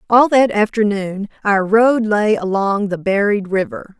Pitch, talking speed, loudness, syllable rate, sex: 205 Hz, 150 wpm, -16 LUFS, 4.1 syllables/s, female